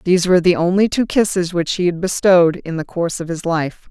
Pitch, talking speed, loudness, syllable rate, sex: 175 Hz, 245 wpm, -17 LUFS, 6.1 syllables/s, female